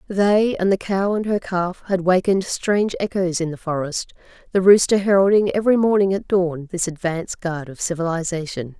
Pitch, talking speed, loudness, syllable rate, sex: 185 Hz, 175 wpm, -20 LUFS, 5.4 syllables/s, female